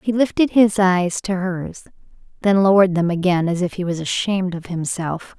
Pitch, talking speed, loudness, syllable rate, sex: 185 Hz, 190 wpm, -19 LUFS, 5.1 syllables/s, female